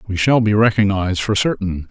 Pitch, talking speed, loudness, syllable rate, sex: 100 Hz, 190 wpm, -17 LUFS, 5.7 syllables/s, male